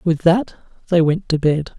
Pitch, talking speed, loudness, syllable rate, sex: 165 Hz, 200 wpm, -18 LUFS, 4.4 syllables/s, male